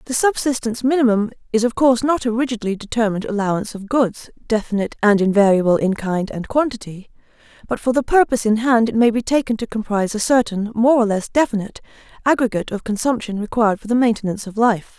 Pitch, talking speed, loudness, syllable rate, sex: 225 Hz, 190 wpm, -18 LUFS, 6.6 syllables/s, female